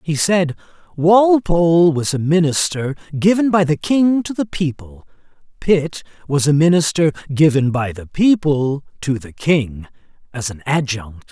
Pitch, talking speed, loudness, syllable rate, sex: 150 Hz, 140 wpm, -17 LUFS, 4.2 syllables/s, male